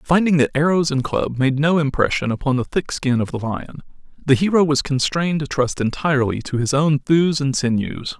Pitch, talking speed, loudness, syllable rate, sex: 145 Hz, 205 wpm, -19 LUFS, 5.2 syllables/s, male